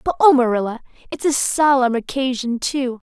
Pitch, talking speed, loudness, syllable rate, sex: 255 Hz, 155 wpm, -18 LUFS, 5.1 syllables/s, female